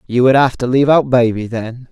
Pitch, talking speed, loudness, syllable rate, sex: 125 Hz, 250 wpm, -14 LUFS, 5.8 syllables/s, male